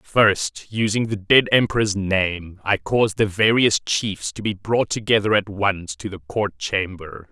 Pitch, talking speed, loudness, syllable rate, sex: 100 Hz, 170 wpm, -20 LUFS, 4.0 syllables/s, male